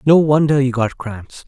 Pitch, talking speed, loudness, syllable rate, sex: 130 Hz, 205 wpm, -15 LUFS, 4.4 syllables/s, male